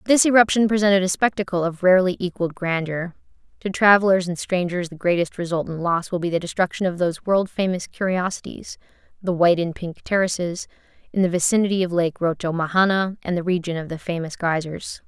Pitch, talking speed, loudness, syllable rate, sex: 180 Hz, 175 wpm, -21 LUFS, 6.0 syllables/s, female